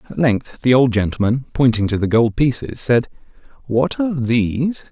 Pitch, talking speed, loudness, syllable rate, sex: 125 Hz, 170 wpm, -17 LUFS, 5.0 syllables/s, male